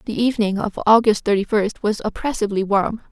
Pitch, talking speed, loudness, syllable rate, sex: 210 Hz, 175 wpm, -19 LUFS, 6.0 syllables/s, female